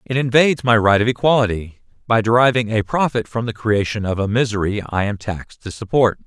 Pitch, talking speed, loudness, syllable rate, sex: 115 Hz, 200 wpm, -18 LUFS, 5.8 syllables/s, male